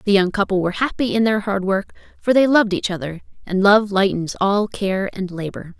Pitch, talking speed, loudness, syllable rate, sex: 200 Hz, 220 wpm, -19 LUFS, 5.4 syllables/s, female